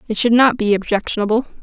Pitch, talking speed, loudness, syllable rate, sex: 225 Hz, 185 wpm, -16 LUFS, 6.8 syllables/s, female